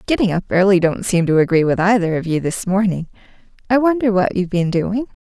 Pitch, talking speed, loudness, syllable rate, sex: 190 Hz, 220 wpm, -17 LUFS, 6.1 syllables/s, female